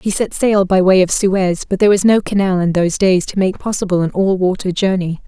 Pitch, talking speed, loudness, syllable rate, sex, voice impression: 190 Hz, 250 wpm, -15 LUFS, 5.6 syllables/s, female, feminine, adult-like, tensed, powerful, clear, fluent, intellectual, slightly friendly, elegant, lively, slightly strict, intense, sharp